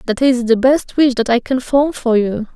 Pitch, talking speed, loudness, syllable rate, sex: 250 Hz, 260 wpm, -15 LUFS, 4.8 syllables/s, female